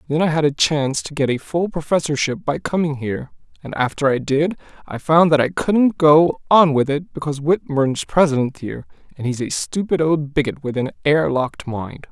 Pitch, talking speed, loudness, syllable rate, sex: 145 Hz, 205 wpm, -19 LUFS, 5.3 syllables/s, male